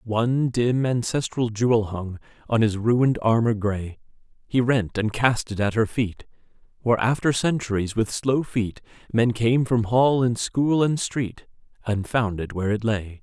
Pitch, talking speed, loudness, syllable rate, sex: 115 Hz, 170 wpm, -23 LUFS, 4.4 syllables/s, male